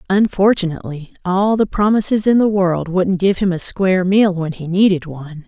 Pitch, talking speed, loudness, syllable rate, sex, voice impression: 185 Hz, 185 wpm, -16 LUFS, 5.2 syllables/s, female, slightly feminine, very gender-neutral, very adult-like, slightly middle-aged, slightly thin, slightly tensed, slightly dark, hard, clear, fluent, very cool, very intellectual, refreshing, sincere, slightly calm, friendly, slightly reassuring, slightly elegant, strict, slightly modest